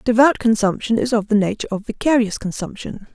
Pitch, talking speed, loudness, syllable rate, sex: 220 Hz, 170 wpm, -19 LUFS, 6.1 syllables/s, female